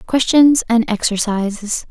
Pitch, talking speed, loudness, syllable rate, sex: 235 Hz, 95 wpm, -15 LUFS, 4.2 syllables/s, female